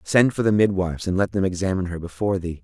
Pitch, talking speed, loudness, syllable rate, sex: 95 Hz, 250 wpm, -22 LUFS, 7.1 syllables/s, male